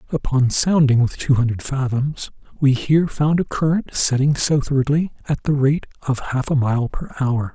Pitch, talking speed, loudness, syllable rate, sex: 140 Hz, 175 wpm, -19 LUFS, 4.7 syllables/s, male